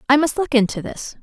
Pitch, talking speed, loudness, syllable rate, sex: 265 Hz, 245 wpm, -19 LUFS, 5.9 syllables/s, female